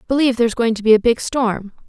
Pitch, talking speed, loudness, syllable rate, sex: 230 Hz, 255 wpm, -17 LUFS, 6.3 syllables/s, female